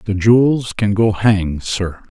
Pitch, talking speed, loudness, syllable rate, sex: 105 Hz, 165 wpm, -16 LUFS, 3.7 syllables/s, male